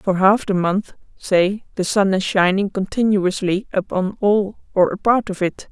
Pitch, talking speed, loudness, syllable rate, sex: 195 Hz, 180 wpm, -19 LUFS, 4.3 syllables/s, female